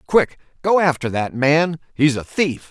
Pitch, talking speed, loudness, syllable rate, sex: 150 Hz, 135 wpm, -19 LUFS, 4.1 syllables/s, male